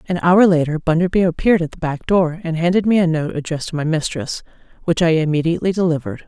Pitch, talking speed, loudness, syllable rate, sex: 165 Hz, 210 wpm, -17 LUFS, 6.8 syllables/s, female